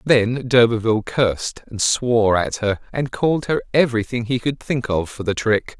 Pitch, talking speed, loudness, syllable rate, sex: 120 Hz, 185 wpm, -19 LUFS, 5.0 syllables/s, male